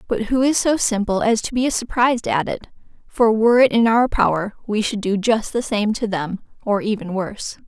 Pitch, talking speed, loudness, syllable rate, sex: 220 Hz, 220 wpm, -19 LUFS, 5.3 syllables/s, female